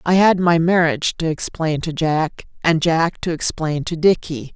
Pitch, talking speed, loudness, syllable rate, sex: 165 Hz, 185 wpm, -18 LUFS, 4.4 syllables/s, female